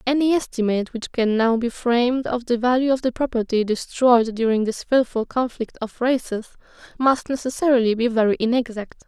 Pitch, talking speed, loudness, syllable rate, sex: 240 Hz, 165 wpm, -21 LUFS, 5.5 syllables/s, female